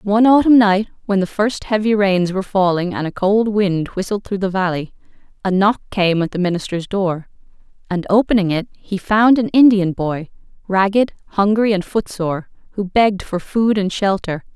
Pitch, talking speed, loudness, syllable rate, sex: 195 Hz, 180 wpm, -17 LUFS, 5.0 syllables/s, female